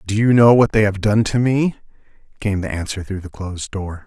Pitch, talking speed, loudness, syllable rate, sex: 105 Hz, 235 wpm, -18 LUFS, 5.5 syllables/s, male